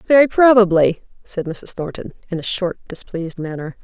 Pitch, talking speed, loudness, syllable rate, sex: 190 Hz, 155 wpm, -18 LUFS, 5.3 syllables/s, female